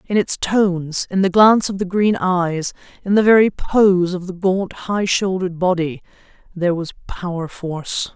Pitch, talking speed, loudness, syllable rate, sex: 185 Hz, 170 wpm, -18 LUFS, 4.7 syllables/s, female